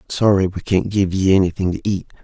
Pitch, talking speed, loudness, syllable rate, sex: 95 Hz, 215 wpm, -18 LUFS, 5.9 syllables/s, male